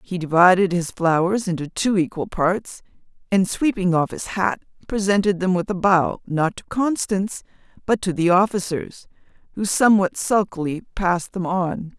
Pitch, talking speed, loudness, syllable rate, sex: 185 Hz, 155 wpm, -20 LUFS, 4.8 syllables/s, female